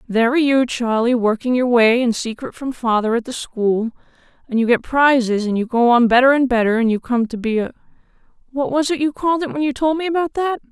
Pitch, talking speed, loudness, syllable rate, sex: 250 Hz, 235 wpm, -17 LUFS, 5.9 syllables/s, female